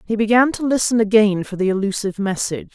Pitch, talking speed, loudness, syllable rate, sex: 210 Hz, 195 wpm, -18 LUFS, 6.5 syllables/s, female